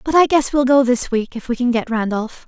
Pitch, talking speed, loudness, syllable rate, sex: 250 Hz, 290 wpm, -17 LUFS, 5.5 syllables/s, female